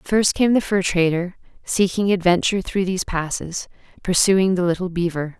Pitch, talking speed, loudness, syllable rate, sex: 185 Hz, 155 wpm, -20 LUFS, 5.1 syllables/s, female